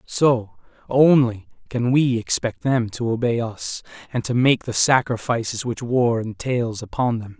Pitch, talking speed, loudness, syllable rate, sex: 120 Hz, 155 wpm, -21 LUFS, 4.2 syllables/s, male